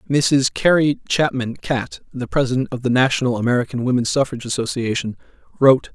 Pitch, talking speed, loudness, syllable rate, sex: 130 Hz, 140 wpm, -19 LUFS, 6.0 syllables/s, male